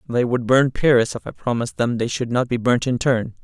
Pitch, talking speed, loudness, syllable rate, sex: 120 Hz, 260 wpm, -20 LUFS, 5.6 syllables/s, male